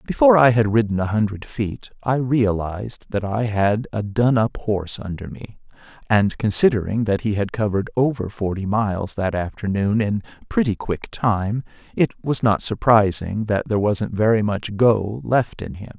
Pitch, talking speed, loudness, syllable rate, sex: 110 Hz, 175 wpm, -20 LUFS, 4.8 syllables/s, male